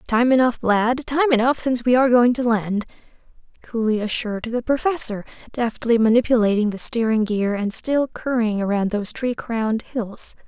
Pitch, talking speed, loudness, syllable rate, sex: 230 Hz, 160 wpm, -20 LUFS, 5.2 syllables/s, female